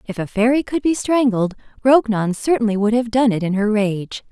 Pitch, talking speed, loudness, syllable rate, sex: 225 Hz, 210 wpm, -18 LUFS, 5.2 syllables/s, female